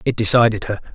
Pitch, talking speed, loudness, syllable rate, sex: 110 Hz, 190 wpm, -15 LUFS, 6.9 syllables/s, male